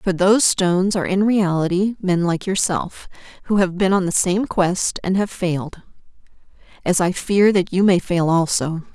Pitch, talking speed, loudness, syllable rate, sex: 185 Hz, 180 wpm, -18 LUFS, 4.8 syllables/s, female